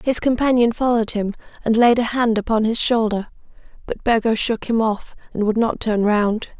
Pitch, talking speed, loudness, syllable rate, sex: 225 Hz, 190 wpm, -19 LUFS, 5.2 syllables/s, female